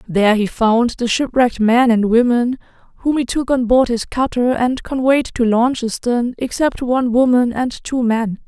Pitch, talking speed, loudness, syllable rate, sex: 240 Hz, 175 wpm, -16 LUFS, 4.7 syllables/s, female